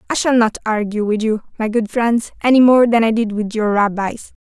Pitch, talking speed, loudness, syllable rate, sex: 225 Hz, 215 wpm, -16 LUFS, 5.5 syllables/s, female